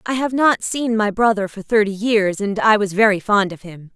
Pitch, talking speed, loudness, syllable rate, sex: 210 Hz, 245 wpm, -17 LUFS, 5.0 syllables/s, female